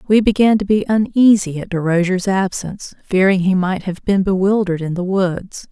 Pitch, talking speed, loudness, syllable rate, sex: 190 Hz, 180 wpm, -16 LUFS, 5.2 syllables/s, female